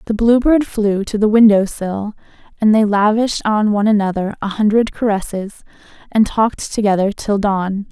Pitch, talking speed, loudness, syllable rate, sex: 210 Hz, 165 wpm, -16 LUFS, 5.2 syllables/s, female